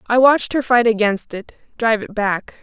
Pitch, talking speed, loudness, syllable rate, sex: 225 Hz, 205 wpm, -17 LUFS, 5.3 syllables/s, female